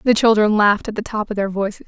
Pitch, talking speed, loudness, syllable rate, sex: 210 Hz, 290 wpm, -18 LUFS, 6.9 syllables/s, female